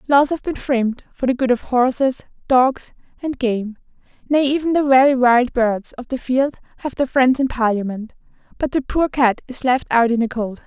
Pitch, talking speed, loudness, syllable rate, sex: 255 Hz, 205 wpm, -18 LUFS, 4.9 syllables/s, female